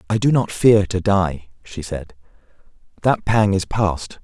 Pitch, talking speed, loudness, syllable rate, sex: 95 Hz, 170 wpm, -19 LUFS, 3.9 syllables/s, male